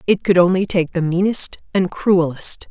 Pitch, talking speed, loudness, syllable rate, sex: 180 Hz, 180 wpm, -17 LUFS, 4.5 syllables/s, female